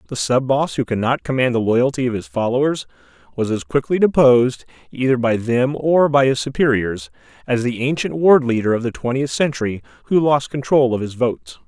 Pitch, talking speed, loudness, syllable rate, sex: 130 Hz, 195 wpm, -18 LUFS, 5.5 syllables/s, male